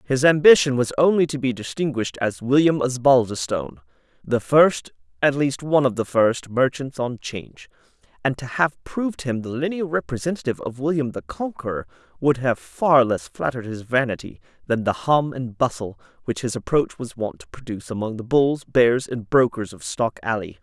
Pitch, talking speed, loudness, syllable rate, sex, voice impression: 130 Hz, 175 wpm, -22 LUFS, 5.2 syllables/s, male, masculine, middle-aged, tensed, powerful, slightly hard, muffled, intellectual, mature, friendly, wild, lively, slightly strict